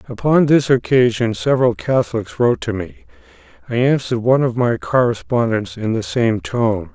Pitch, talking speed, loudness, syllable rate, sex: 120 Hz, 155 wpm, -17 LUFS, 5.2 syllables/s, male